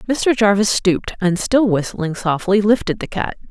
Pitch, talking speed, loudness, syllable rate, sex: 205 Hz, 170 wpm, -17 LUFS, 4.8 syllables/s, female